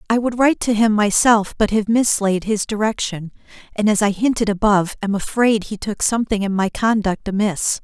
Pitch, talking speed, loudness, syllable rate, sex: 210 Hz, 190 wpm, -18 LUFS, 5.4 syllables/s, female